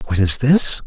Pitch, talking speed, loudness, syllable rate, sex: 125 Hz, 210 wpm, -12 LUFS, 4.4 syllables/s, male